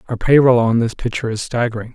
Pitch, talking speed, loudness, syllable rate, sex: 120 Hz, 215 wpm, -16 LUFS, 6.8 syllables/s, male